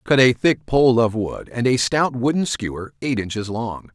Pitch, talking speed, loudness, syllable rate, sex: 120 Hz, 215 wpm, -20 LUFS, 4.5 syllables/s, male